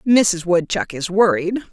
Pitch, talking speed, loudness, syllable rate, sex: 190 Hz, 140 wpm, -18 LUFS, 4.1 syllables/s, female